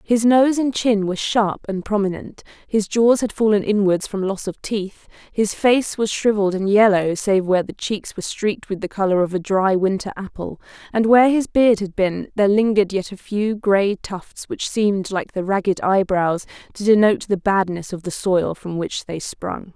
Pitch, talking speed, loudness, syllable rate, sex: 200 Hz, 205 wpm, -19 LUFS, 5.0 syllables/s, female